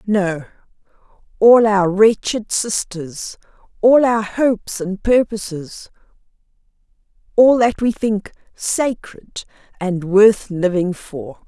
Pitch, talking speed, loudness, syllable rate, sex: 205 Hz, 90 wpm, -16 LUFS, 3.3 syllables/s, female